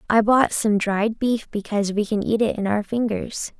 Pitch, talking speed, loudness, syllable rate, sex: 215 Hz, 215 wpm, -21 LUFS, 4.8 syllables/s, female